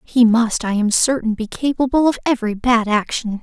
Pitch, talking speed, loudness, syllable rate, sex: 235 Hz, 190 wpm, -17 LUFS, 5.2 syllables/s, female